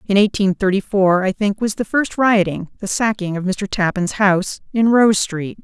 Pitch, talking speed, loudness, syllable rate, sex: 200 Hz, 200 wpm, -17 LUFS, 4.7 syllables/s, female